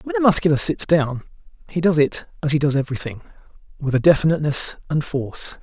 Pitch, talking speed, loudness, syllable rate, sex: 150 Hz, 160 wpm, -19 LUFS, 6.2 syllables/s, male